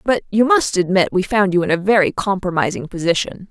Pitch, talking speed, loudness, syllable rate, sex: 195 Hz, 205 wpm, -17 LUFS, 5.8 syllables/s, female